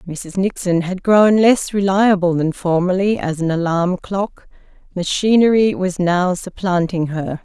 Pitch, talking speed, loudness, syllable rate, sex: 185 Hz, 135 wpm, -17 LUFS, 4.1 syllables/s, female